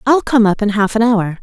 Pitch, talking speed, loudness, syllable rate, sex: 220 Hz, 295 wpm, -14 LUFS, 5.5 syllables/s, female